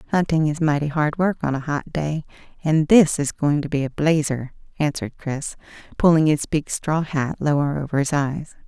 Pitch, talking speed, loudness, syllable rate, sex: 150 Hz, 195 wpm, -21 LUFS, 4.8 syllables/s, female